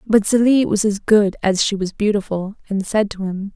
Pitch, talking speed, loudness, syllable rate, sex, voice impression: 205 Hz, 220 wpm, -18 LUFS, 4.9 syllables/s, female, feminine, slightly young, slightly tensed, bright, slightly soft, clear, fluent, slightly cute, calm, friendly, slightly reassuring, lively, sharp, light